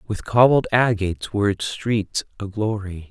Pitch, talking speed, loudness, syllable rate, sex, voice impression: 105 Hz, 155 wpm, -21 LUFS, 4.7 syllables/s, male, masculine, adult-like, intellectual, sincere, slightly calm, reassuring, elegant, slightly sweet